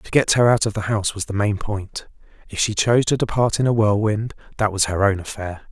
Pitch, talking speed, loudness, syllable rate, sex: 105 Hz, 250 wpm, -20 LUFS, 5.8 syllables/s, male